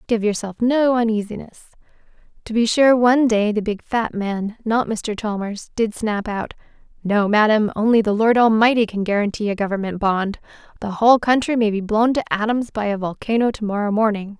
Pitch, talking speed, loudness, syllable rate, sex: 215 Hz, 180 wpm, -19 LUFS, 5.3 syllables/s, female